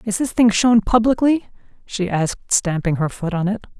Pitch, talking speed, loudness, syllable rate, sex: 210 Hz, 190 wpm, -18 LUFS, 5.0 syllables/s, female